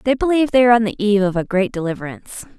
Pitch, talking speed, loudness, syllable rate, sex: 215 Hz, 255 wpm, -17 LUFS, 8.0 syllables/s, female